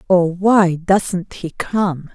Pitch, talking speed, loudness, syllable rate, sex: 180 Hz, 140 wpm, -17 LUFS, 2.6 syllables/s, female